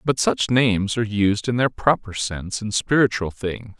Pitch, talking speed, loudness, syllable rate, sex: 105 Hz, 190 wpm, -21 LUFS, 4.9 syllables/s, male